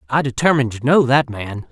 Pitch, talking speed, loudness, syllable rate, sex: 130 Hz, 210 wpm, -17 LUFS, 6.0 syllables/s, male